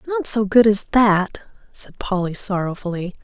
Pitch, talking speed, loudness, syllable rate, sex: 205 Hz, 150 wpm, -18 LUFS, 4.6 syllables/s, female